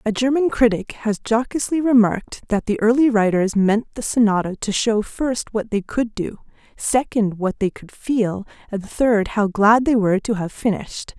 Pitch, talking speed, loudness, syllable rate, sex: 220 Hz, 180 wpm, -19 LUFS, 4.9 syllables/s, female